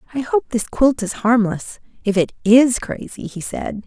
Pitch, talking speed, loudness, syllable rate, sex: 230 Hz, 185 wpm, -19 LUFS, 4.3 syllables/s, female